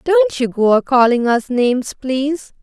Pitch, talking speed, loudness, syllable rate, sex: 270 Hz, 185 wpm, -16 LUFS, 4.5 syllables/s, female